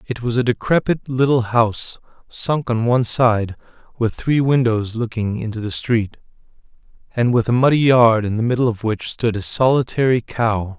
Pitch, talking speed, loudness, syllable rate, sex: 115 Hz, 170 wpm, -18 LUFS, 4.9 syllables/s, male